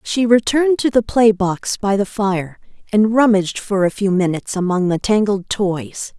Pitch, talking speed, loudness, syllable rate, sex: 205 Hz, 185 wpm, -17 LUFS, 4.7 syllables/s, female